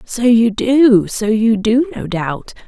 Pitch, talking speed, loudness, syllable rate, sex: 230 Hz, 180 wpm, -14 LUFS, 3.3 syllables/s, female